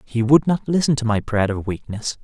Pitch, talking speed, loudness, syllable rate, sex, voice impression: 125 Hz, 240 wpm, -20 LUFS, 5.2 syllables/s, male, very masculine, slightly young, very adult-like, very thick, slightly relaxed, powerful, bright, very soft, muffled, fluent, cool, very intellectual, very sincere, very calm, very mature, friendly, very reassuring, very unique, very elegant, slightly wild, very sweet, slightly lively, very kind, very modest, slightly light